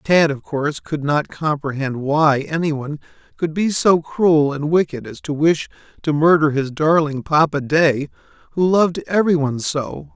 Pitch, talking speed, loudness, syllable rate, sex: 155 Hz, 170 wpm, -18 LUFS, 4.7 syllables/s, male